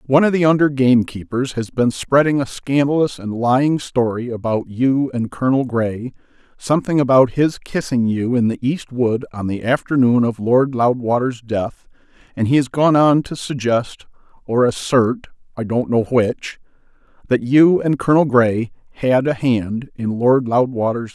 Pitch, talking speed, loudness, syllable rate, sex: 125 Hz, 160 wpm, -17 LUFS, 4.7 syllables/s, male